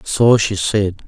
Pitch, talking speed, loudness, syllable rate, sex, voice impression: 100 Hz, 170 wpm, -15 LUFS, 3.2 syllables/s, male, masculine, adult-like, relaxed, slightly powerful, muffled, cool, calm, slightly mature, friendly, wild, slightly lively, slightly kind